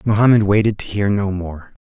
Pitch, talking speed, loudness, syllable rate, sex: 100 Hz, 195 wpm, -17 LUFS, 5.4 syllables/s, male